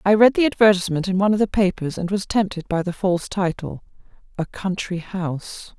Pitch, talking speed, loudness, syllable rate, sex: 190 Hz, 195 wpm, -21 LUFS, 5.8 syllables/s, female